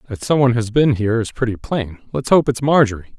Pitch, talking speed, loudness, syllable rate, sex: 120 Hz, 205 wpm, -17 LUFS, 6.3 syllables/s, male